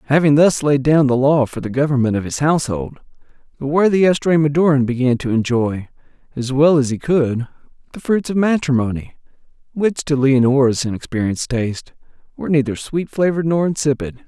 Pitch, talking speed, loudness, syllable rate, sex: 140 Hz, 160 wpm, -17 LUFS, 5.7 syllables/s, male